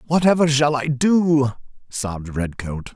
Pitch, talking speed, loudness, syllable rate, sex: 135 Hz, 120 wpm, -20 LUFS, 4.2 syllables/s, male